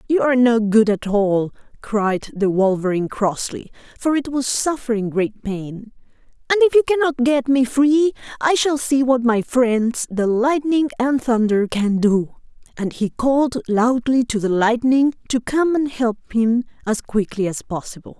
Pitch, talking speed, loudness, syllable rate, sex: 240 Hz, 170 wpm, -19 LUFS, 4.4 syllables/s, female